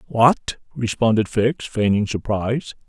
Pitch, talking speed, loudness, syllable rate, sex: 110 Hz, 105 wpm, -20 LUFS, 4.1 syllables/s, male